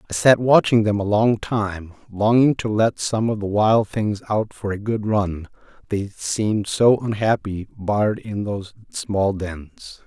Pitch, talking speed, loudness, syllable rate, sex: 105 Hz, 175 wpm, -20 LUFS, 4.0 syllables/s, male